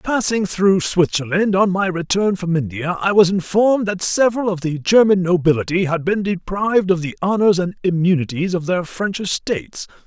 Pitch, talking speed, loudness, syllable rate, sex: 185 Hz, 175 wpm, -18 LUFS, 5.1 syllables/s, male